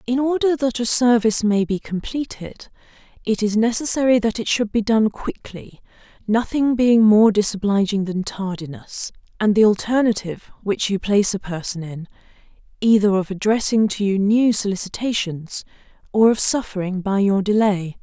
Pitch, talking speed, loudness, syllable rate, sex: 215 Hz, 150 wpm, -19 LUFS, 5.0 syllables/s, female